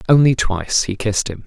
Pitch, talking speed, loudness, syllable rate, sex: 110 Hz, 205 wpm, -17 LUFS, 6.2 syllables/s, male